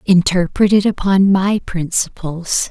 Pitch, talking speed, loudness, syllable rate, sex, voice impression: 185 Hz, 110 wpm, -15 LUFS, 3.8 syllables/s, female, very feminine, adult-like, thin, relaxed, slightly weak, slightly dark, very soft, muffled, fluent, slightly raspy, very cute, very intellectual, refreshing, sincere, calm, very friendly, very reassuring, very unique, very elegant, slightly wild, very sweet, slightly lively, very kind, modest, light